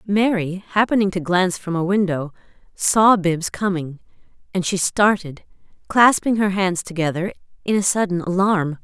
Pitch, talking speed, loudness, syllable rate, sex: 185 Hz, 145 wpm, -19 LUFS, 4.8 syllables/s, female